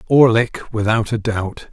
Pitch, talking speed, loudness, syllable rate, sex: 110 Hz, 140 wpm, -17 LUFS, 4.3 syllables/s, male